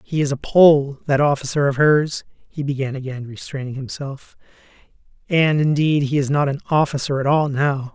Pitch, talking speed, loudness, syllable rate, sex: 140 Hz, 175 wpm, -19 LUFS, 5.0 syllables/s, male